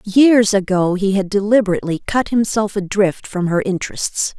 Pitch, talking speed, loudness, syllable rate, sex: 200 Hz, 150 wpm, -17 LUFS, 5.0 syllables/s, female